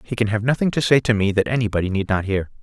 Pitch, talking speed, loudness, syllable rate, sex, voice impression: 110 Hz, 295 wpm, -20 LUFS, 7.0 syllables/s, male, very masculine, very middle-aged, very thick, tensed, slightly weak, slightly bright, soft, muffled, fluent, slightly raspy, cool, very intellectual, very refreshing, sincere, very calm, mature, very friendly, very reassuring, very unique, very elegant, wild, slightly sweet, lively, kind